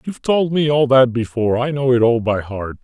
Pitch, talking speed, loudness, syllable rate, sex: 125 Hz, 255 wpm, -17 LUFS, 5.5 syllables/s, male